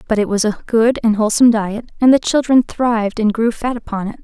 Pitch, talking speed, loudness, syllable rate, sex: 225 Hz, 240 wpm, -15 LUFS, 5.9 syllables/s, female